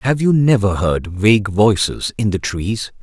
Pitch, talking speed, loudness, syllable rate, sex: 105 Hz, 180 wpm, -16 LUFS, 4.2 syllables/s, male